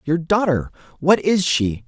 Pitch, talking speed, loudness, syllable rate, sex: 160 Hz, 130 wpm, -19 LUFS, 4.1 syllables/s, male